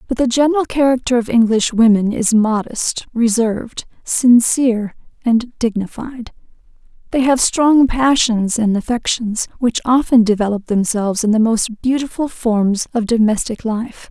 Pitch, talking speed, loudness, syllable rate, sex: 235 Hz, 130 wpm, -16 LUFS, 4.6 syllables/s, female